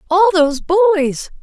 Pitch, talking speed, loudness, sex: 350 Hz, 125 wpm, -14 LUFS, female